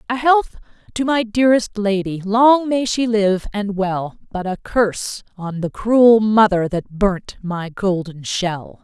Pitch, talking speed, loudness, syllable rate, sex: 210 Hz, 165 wpm, -18 LUFS, 3.8 syllables/s, female